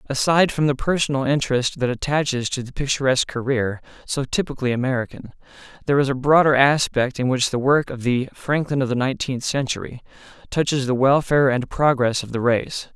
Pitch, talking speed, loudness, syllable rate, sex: 135 Hz, 175 wpm, -20 LUFS, 5.9 syllables/s, male